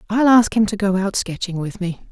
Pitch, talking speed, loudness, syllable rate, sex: 200 Hz, 255 wpm, -18 LUFS, 5.3 syllables/s, female